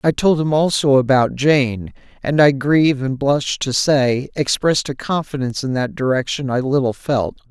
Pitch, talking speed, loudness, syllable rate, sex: 135 Hz, 175 wpm, -17 LUFS, 4.7 syllables/s, male